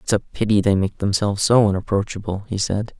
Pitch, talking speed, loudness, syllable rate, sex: 105 Hz, 200 wpm, -20 LUFS, 5.8 syllables/s, male